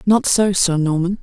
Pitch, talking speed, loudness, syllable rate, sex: 185 Hz, 195 wpm, -16 LUFS, 4.5 syllables/s, female